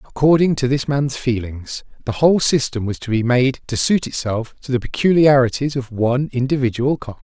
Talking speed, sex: 180 wpm, male